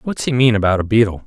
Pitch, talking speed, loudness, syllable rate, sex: 110 Hz, 285 wpm, -16 LUFS, 6.8 syllables/s, male